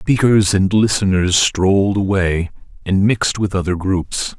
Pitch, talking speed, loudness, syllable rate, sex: 100 Hz, 135 wpm, -16 LUFS, 4.3 syllables/s, male